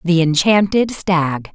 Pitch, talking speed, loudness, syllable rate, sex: 175 Hz, 115 wpm, -15 LUFS, 3.5 syllables/s, female